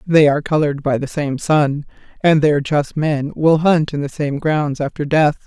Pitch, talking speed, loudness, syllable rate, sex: 150 Hz, 210 wpm, -17 LUFS, 4.7 syllables/s, female